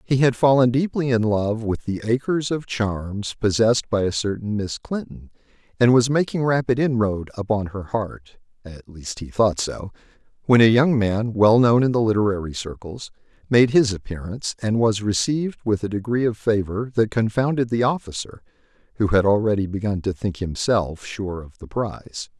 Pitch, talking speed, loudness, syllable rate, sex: 110 Hz, 170 wpm, -21 LUFS, 4.9 syllables/s, male